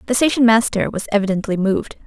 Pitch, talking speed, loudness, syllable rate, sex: 215 Hz, 175 wpm, -17 LUFS, 6.8 syllables/s, female